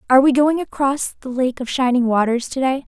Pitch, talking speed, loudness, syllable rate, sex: 260 Hz, 205 wpm, -18 LUFS, 5.7 syllables/s, female